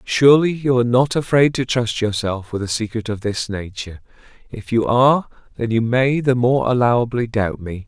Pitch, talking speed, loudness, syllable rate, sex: 120 Hz, 190 wpm, -18 LUFS, 5.3 syllables/s, male